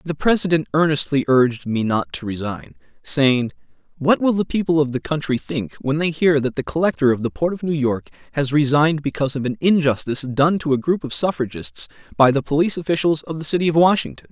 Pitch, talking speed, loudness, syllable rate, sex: 150 Hz, 210 wpm, -19 LUFS, 6.0 syllables/s, male